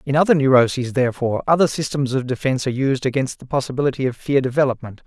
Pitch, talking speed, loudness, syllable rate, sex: 135 Hz, 190 wpm, -19 LUFS, 7.1 syllables/s, male